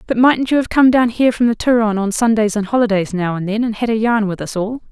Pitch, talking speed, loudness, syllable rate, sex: 220 Hz, 295 wpm, -16 LUFS, 6.1 syllables/s, female